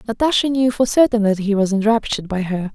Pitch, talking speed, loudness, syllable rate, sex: 215 Hz, 220 wpm, -17 LUFS, 6.2 syllables/s, female